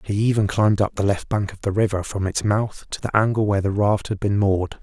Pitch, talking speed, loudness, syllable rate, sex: 100 Hz, 275 wpm, -21 LUFS, 6.0 syllables/s, male